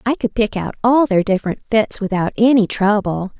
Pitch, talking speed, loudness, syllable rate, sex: 215 Hz, 195 wpm, -17 LUFS, 5.3 syllables/s, female